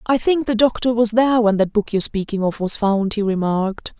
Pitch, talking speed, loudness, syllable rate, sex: 220 Hz, 240 wpm, -18 LUFS, 5.7 syllables/s, female